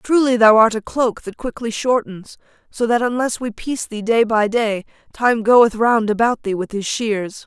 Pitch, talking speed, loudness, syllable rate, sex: 225 Hz, 200 wpm, -17 LUFS, 4.6 syllables/s, female